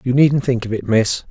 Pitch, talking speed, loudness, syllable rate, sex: 125 Hz, 275 wpm, -17 LUFS, 5.0 syllables/s, male